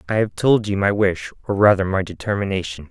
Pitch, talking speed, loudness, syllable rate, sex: 100 Hz, 205 wpm, -19 LUFS, 5.9 syllables/s, male